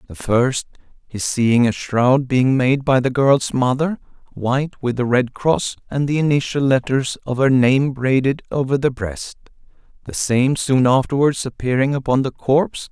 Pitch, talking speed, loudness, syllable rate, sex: 130 Hz, 165 wpm, -18 LUFS, 4.5 syllables/s, male